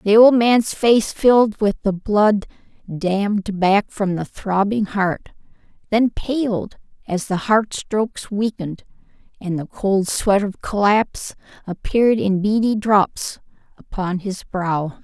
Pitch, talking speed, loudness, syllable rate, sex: 205 Hz, 135 wpm, -19 LUFS, 3.7 syllables/s, female